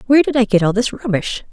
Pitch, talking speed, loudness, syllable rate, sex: 220 Hz, 275 wpm, -16 LUFS, 6.9 syllables/s, female